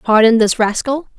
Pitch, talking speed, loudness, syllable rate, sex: 235 Hz, 150 wpm, -14 LUFS, 5.0 syllables/s, female